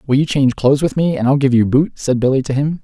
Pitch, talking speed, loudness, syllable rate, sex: 135 Hz, 315 wpm, -15 LUFS, 6.7 syllables/s, male